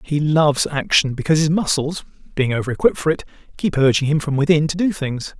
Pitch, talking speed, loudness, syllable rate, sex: 150 Hz, 210 wpm, -18 LUFS, 6.3 syllables/s, male